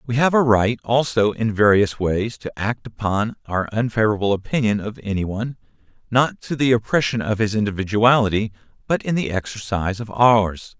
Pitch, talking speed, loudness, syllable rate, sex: 110 Hz, 165 wpm, -20 LUFS, 5.3 syllables/s, male